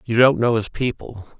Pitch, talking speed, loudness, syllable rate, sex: 115 Hz, 215 wpm, -19 LUFS, 5.0 syllables/s, male